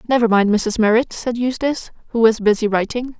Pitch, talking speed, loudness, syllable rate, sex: 230 Hz, 190 wpm, -17 LUFS, 5.7 syllables/s, female